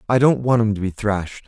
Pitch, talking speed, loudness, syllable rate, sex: 110 Hz, 285 wpm, -19 LUFS, 6.3 syllables/s, male